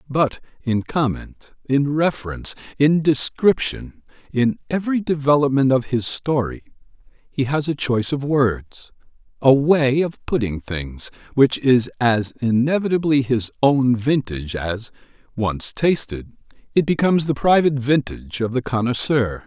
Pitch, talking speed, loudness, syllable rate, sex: 130 Hz, 130 wpm, -20 LUFS, 4.5 syllables/s, male